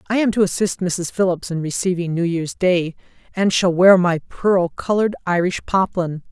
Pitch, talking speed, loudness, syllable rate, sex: 180 Hz, 180 wpm, -19 LUFS, 4.8 syllables/s, female